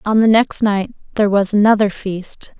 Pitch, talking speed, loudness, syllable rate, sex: 205 Hz, 185 wpm, -15 LUFS, 4.9 syllables/s, female